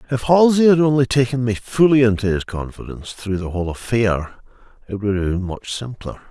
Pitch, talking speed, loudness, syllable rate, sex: 115 Hz, 190 wpm, -18 LUFS, 5.6 syllables/s, male